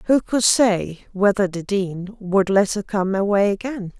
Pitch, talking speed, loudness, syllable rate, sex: 200 Hz, 180 wpm, -20 LUFS, 4.1 syllables/s, female